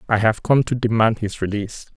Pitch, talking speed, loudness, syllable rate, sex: 110 Hz, 210 wpm, -20 LUFS, 5.9 syllables/s, male